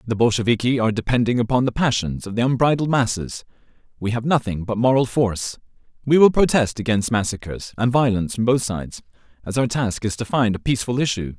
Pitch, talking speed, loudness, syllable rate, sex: 115 Hz, 190 wpm, -20 LUFS, 6.2 syllables/s, male